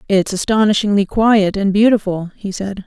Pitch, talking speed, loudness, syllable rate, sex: 200 Hz, 145 wpm, -15 LUFS, 4.9 syllables/s, female